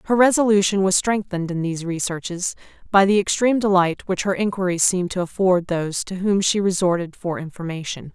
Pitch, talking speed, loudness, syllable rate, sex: 185 Hz, 175 wpm, -20 LUFS, 5.9 syllables/s, female